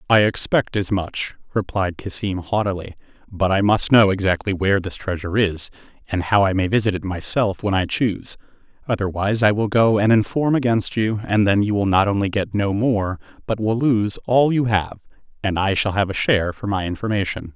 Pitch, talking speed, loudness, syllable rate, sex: 100 Hz, 200 wpm, -20 LUFS, 5.4 syllables/s, male